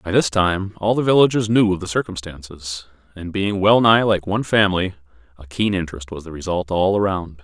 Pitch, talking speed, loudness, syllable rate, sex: 95 Hz, 195 wpm, -19 LUFS, 5.5 syllables/s, male